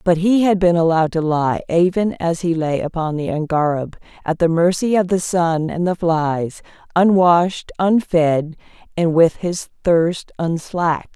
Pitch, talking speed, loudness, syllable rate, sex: 170 Hz, 160 wpm, -18 LUFS, 4.4 syllables/s, female